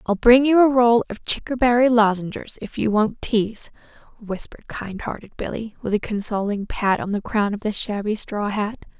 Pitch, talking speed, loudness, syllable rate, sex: 220 Hz, 185 wpm, -21 LUFS, 5.1 syllables/s, female